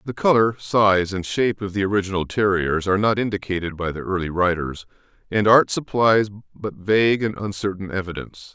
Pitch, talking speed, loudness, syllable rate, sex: 100 Hz, 170 wpm, -21 LUFS, 5.6 syllables/s, male